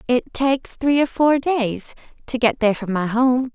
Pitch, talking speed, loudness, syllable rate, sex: 250 Hz, 205 wpm, -19 LUFS, 4.7 syllables/s, female